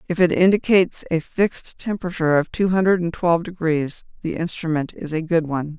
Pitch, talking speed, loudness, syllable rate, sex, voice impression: 170 Hz, 185 wpm, -21 LUFS, 6.0 syllables/s, female, feminine, adult-like, tensed, powerful, clear, slightly nasal, slightly intellectual, friendly, reassuring, slightly lively, strict, slightly sharp